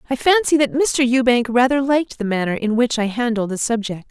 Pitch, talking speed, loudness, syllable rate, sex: 245 Hz, 220 wpm, -18 LUFS, 5.7 syllables/s, female